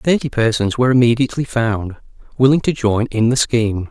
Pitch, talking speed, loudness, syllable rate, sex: 120 Hz, 170 wpm, -16 LUFS, 5.8 syllables/s, male